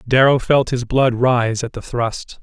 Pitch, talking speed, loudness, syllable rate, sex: 125 Hz, 200 wpm, -17 LUFS, 3.9 syllables/s, male